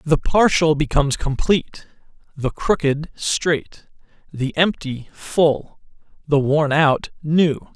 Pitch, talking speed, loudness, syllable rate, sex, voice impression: 155 Hz, 110 wpm, -19 LUFS, 3.5 syllables/s, male, masculine, slightly adult-like, tensed, clear, intellectual, reassuring